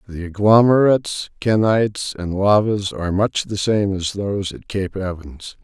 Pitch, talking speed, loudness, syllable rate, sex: 100 Hz, 150 wpm, -18 LUFS, 4.5 syllables/s, male